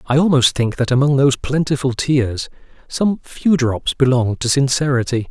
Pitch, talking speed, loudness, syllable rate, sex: 135 Hz, 160 wpm, -17 LUFS, 5.0 syllables/s, male